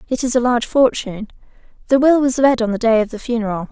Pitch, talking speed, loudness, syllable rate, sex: 235 Hz, 240 wpm, -16 LUFS, 6.9 syllables/s, female